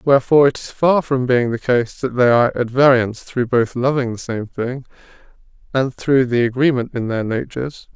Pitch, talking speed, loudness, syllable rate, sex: 125 Hz, 195 wpm, -17 LUFS, 5.3 syllables/s, male